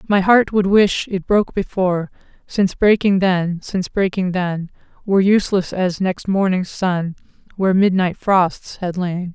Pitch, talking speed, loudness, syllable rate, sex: 190 Hz, 155 wpm, -18 LUFS, 4.6 syllables/s, female